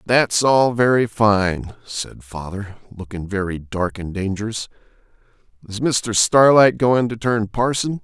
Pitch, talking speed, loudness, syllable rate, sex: 110 Hz, 135 wpm, -18 LUFS, 4.0 syllables/s, male